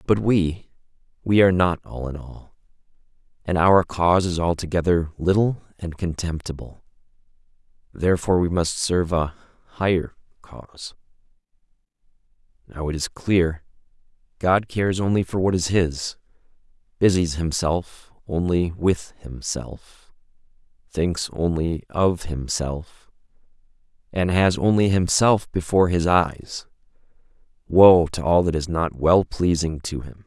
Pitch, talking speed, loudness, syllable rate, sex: 85 Hz, 115 wpm, -21 LUFS, 4.3 syllables/s, male